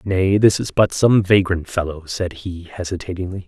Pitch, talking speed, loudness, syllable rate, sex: 90 Hz, 175 wpm, -18 LUFS, 4.8 syllables/s, male